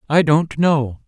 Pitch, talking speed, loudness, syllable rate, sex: 150 Hz, 170 wpm, -17 LUFS, 3.6 syllables/s, male